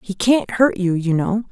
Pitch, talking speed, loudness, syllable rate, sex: 205 Hz, 235 wpm, -18 LUFS, 4.4 syllables/s, female